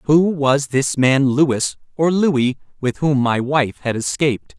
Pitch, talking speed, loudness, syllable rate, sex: 140 Hz, 145 wpm, -18 LUFS, 4.0 syllables/s, male